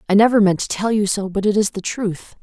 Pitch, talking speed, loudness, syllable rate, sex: 205 Hz, 295 wpm, -18 LUFS, 5.9 syllables/s, female